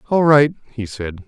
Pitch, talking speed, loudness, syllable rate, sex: 125 Hz, 190 wpm, -16 LUFS, 4.7 syllables/s, male